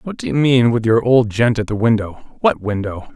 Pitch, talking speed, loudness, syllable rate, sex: 115 Hz, 230 wpm, -16 LUFS, 5.6 syllables/s, male